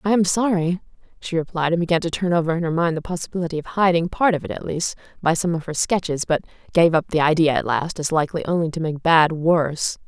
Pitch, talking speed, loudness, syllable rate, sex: 165 Hz, 245 wpm, -21 LUFS, 6.3 syllables/s, female